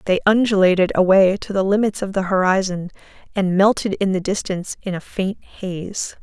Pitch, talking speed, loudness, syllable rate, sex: 190 Hz, 175 wpm, -19 LUFS, 5.4 syllables/s, female